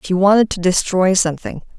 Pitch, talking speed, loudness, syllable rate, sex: 185 Hz, 170 wpm, -15 LUFS, 5.8 syllables/s, female